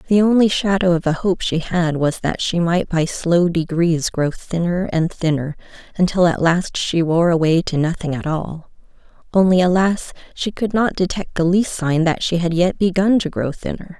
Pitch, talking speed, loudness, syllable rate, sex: 175 Hz, 195 wpm, -18 LUFS, 4.7 syllables/s, female